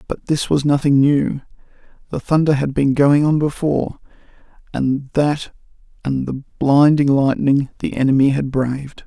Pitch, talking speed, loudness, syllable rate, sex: 140 Hz, 145 wpm, -17 LUFS, 4.5 syllables/s, male